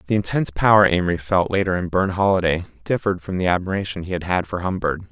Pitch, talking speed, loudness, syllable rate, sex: 90 Hz, 210 wpm, -20 LUFS, 7.0 syllables/s, male